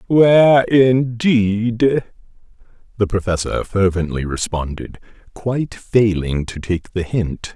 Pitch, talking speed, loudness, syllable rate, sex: 105 Hz, 95 wpm, -17 LUFS, 3.6 syllables/s, male